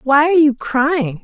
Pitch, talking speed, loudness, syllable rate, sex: 280 Hz, 195 wpm, -14 LUFS, 4.4 syllables/s, female